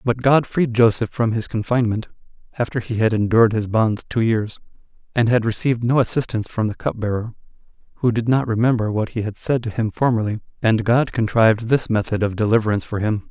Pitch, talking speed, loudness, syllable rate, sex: 115 Hz, 195 wpm, -20 LUFS, 6.0 syllables/s, male